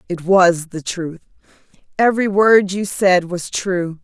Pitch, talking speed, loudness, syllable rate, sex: 185 Hz, 150 wpm, -16 LUFS, 3.9 syllables/s, female